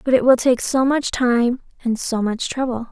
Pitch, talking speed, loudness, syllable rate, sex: 245 Hz, 225 wpm, -19 LUFS, 4.6 syllables/s, female